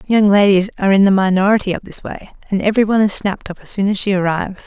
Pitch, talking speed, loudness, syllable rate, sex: 195 Hz, 255 wpm, -15 LUFS, 7.3 syllables/s, female